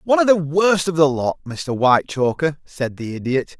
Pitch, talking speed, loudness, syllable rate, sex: 150 Hz, 200 wpm, -19 LUFS, 5.0 syllables/s, male